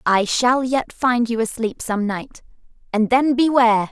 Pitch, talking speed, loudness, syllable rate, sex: 235 Hz, 170 wpm, -19 LUFS, 4.2 syllables/s, female